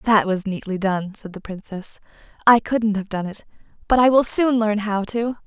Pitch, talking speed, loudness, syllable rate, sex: 210 Hz, 210 wpm, -20 LUFS, 4.8 syllables/s, female